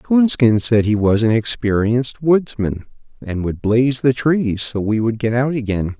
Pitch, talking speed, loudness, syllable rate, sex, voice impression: 120 Hz, 180 wpm, -17 LUFS, 4.5 syllables/s, male, masculine, middle-aged, slightly thick, weak, soft, slightly fluent, calm, slightly mature, friendly, reassuring, slightly wild, lively, kind